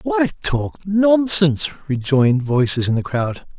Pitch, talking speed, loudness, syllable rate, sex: 150 Hz, 135 wpm, -17 LUFS, 4.1 syllables/s, male